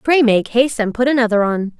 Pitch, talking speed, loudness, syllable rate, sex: 235 Hz, 235 wpm, -15 LUFS, 5.9 syllables/s, female